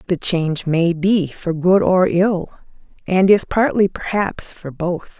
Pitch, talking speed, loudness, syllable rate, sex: 180 Hz, 160 wpm, -17 LUFS, 3.9 syllables/s, female